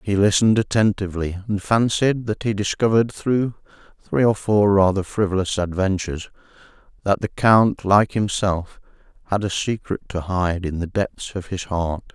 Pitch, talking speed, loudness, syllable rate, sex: 100 Hz, 155 wpm, -20 LUFS, 4.8 syllables/s, male